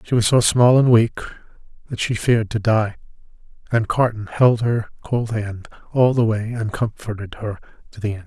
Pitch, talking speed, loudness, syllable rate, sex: 110 Hz, 190 wpm, -19 LUFS, 5.2 syllables/s, male